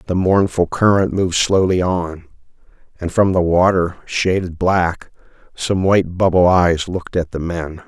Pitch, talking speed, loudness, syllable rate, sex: 90 Hz, 150 wpm, -17 LUFS, 4.5 syllables/s, male